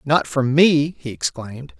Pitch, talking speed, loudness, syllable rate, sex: 145 Hz, 165 wpm, -18 LUFS, 4.3 syllables/s, male